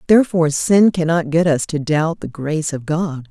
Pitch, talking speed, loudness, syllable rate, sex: 160 Hz, 200 wpm, -17 LUFS, 5.1 syllables/s, female